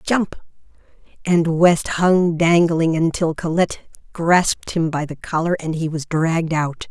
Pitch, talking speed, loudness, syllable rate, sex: 165 Hz, 150 wpm, -19 LUFS, 4.2 syllables/s, female